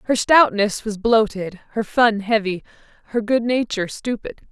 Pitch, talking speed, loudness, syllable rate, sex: 220 Hz, 145 wpm, -19 LUFS, 4.7 syllables/s, female